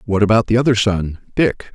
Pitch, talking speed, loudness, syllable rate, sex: 105 Hz, 170 wpm, -16 LUFS, 5.8 syllables/s, male